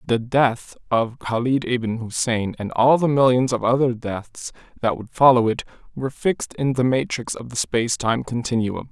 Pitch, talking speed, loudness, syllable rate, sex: 120 Hz, 180 wpm, -21 LUFS, 4.8 syllables/s, male